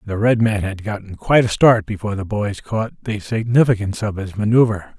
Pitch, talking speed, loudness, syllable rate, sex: 105 Hz, 205 wpm, -18 LUFS, 5.7 syllables/s, male